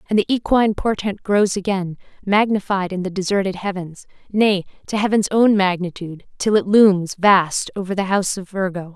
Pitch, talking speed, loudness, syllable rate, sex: 195 Hz, 165 wpm, -19 LUFS, 5.2 syllables/s, female